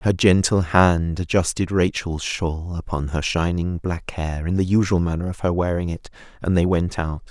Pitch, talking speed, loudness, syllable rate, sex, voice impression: 85 Hz, 190 wpm, -21 LUFS, 4.7 syllables/s, male, very masculine, middle-aged, slightly tensed, slightly weak, bright, soft, muffled, fluent, slightly raspy, cool, intellectual, slightly refreshing, sincere, calm, slightly mature, very friendly, very reassuring, very unique, slightly elegant, wild, sweet, lively, kind, slightly intense